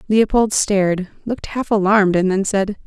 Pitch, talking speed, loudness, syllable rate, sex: 200 Hz, 170 wpm, -17 LUFS, 5.2 syllables/s, female